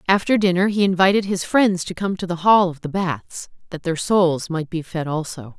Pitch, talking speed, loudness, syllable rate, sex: 180 Hz, 225 wpm, -20 LUFS, 5.0 syllables/s, female